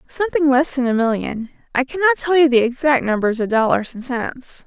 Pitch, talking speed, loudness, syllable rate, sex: 265 Hz, 205 wpm, -18 LUFS, 5.3 syllables/s, female